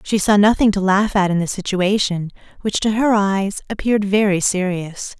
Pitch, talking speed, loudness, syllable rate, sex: 200 Hz, 185 wpm, -17 LUFS, 4.9 syllables/s, female